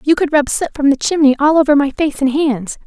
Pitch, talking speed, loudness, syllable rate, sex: 285 Hz, 275 wpm, -14 LUFS, 5.8 syllables/s, female